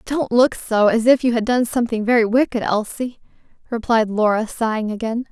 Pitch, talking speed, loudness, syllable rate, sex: 230 Hz, 170 wpm, -18 LUFS, 5.3 syllables/s, female